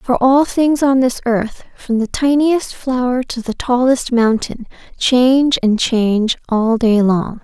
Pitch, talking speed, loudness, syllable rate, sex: 245 Hz, 160 wpm, -15 LUFS, 3.8 syllables/s, female